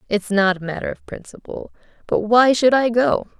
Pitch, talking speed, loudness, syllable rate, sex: 220 Hz, 195 wpm, -18 LUFS, 5.0 syllables/s, female